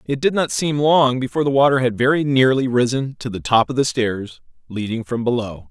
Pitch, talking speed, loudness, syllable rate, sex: 125 Hz, 220 wpm, -18 LUFS, 5.5 syllables/s, male